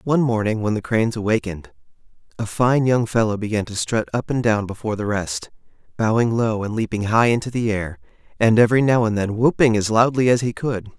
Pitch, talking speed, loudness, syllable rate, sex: 110 Hz, 205 wpm, -20 LUFS, 5.9 syllables/s, male